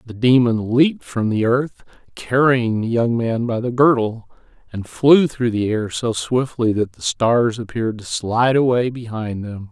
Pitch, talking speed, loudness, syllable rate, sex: 120 Hz, 180 wpm, -18 LUFS, 4.4 syllables/s, male